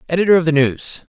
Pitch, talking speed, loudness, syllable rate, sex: 160 Hz, 210 wpm, -15 LUFS, 6.6 syllables/s, male